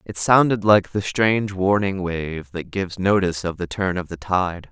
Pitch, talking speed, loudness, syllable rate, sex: 95 Hz, 205 wpm, -21 LUFS, 4.8 syllables/s, male